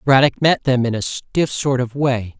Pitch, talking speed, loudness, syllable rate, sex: 130 Hz, 250 wpm, -18 LUFS, 4.8 syllables/s, male